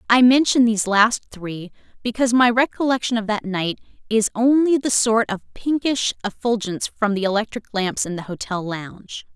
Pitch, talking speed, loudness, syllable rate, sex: 220 Hz, 165 wpm, -20 LUFS, 5.0 syllables/s, female